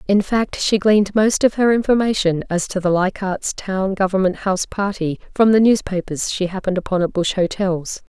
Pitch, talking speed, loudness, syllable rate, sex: 195 Hz, 185 wpm, -18 LUFS, 5.2 syllables/s, female